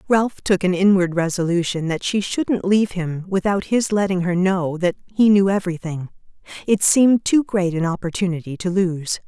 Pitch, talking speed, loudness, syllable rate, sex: 185 Hz, 175 wpm, -19 LUFS, 5.1 syllables/s, female